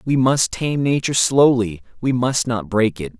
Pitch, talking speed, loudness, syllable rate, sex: 125 Hz, 190 wpm, -18 LUFS, 4.6 syllables/s, male